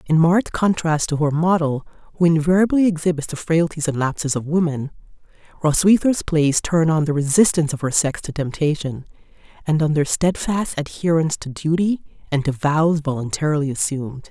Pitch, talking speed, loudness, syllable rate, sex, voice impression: 160 Hz, 160 wpm, -19 LUFS, 5.5 syllables/s, female, feminine, middle-aged, powerful, clear, fluent, intellectual, elegant, lively, strict, sharp